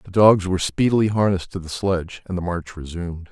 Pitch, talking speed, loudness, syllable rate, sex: 90 Hz, 215 wpm, -21 LUFS, 6.4 syllables/s, male